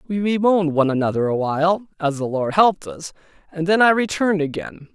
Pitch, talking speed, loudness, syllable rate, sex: 170 Hz, 195 wpm, -19 LUFS, 6.2 syllables/s, male